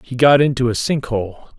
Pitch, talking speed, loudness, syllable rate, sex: 125 Hz, 225 wpm, -16 LUFS, 4.7 syllables/s, male